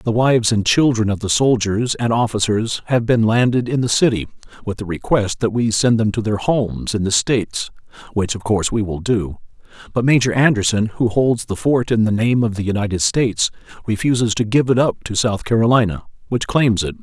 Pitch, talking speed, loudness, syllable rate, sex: 110 Hz, 210 wpm, -17 LUFS, 5.5 syllables/s, male